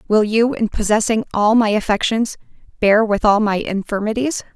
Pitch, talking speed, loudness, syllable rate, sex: 215 Hz, 160 wpm, -17 LUFS, 5.0 syllables/s, female